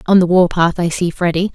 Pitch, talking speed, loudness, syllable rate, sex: 175 Hz, 275 wpm, -15 LUFS, 5.7 syllables/s, female